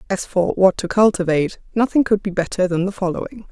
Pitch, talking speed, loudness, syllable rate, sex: 190 Hz, 205 wpm, -19 LUFS, 6.1 syllables/s, female